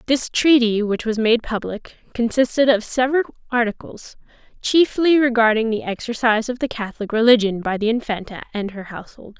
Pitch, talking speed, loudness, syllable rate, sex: 230 Hz, 155 wpm, -19 LUFS, 5.5 syllables/s, female